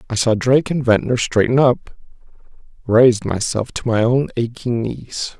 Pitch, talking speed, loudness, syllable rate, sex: 120 Hz, 155 wpm, -17 LUFS, 4.7 syllables/s, male